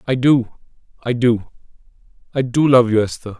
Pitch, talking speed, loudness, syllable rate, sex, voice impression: 120 Hz, 160 wpm, -17 LUFS, 5.2 syllables/s, male, very masculine, slightly middle-aged, thick, tensed, slightly powerful, slightly bright, soft, slightly muffled, fluent, slightly raspy, cool, slightly intellectual, refreshing, sincere, slightly calm, mature, friendly, reassuring, slightly unique, slightly elegant, wild, slightly sweet, lively, slightly strict, slightly modest